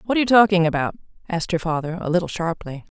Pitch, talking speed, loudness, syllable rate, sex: 175 Hz, 220 wpm, -21 LUFS, 7.7 syllables/s, female